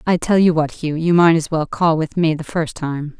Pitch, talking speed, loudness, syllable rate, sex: 160 Hz, 280 wpm, -17 LUFS, 4.9 syllables/s, female